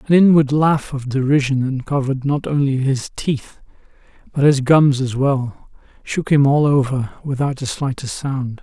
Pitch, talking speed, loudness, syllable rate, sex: 140 Hz, 160 wpm, -18 LUFS, 4.5 syllables/s, male